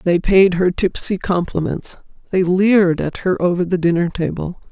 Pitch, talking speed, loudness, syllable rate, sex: 180 Hz, 165 wpm, -17 LUFS, 4.8 syllables/s, female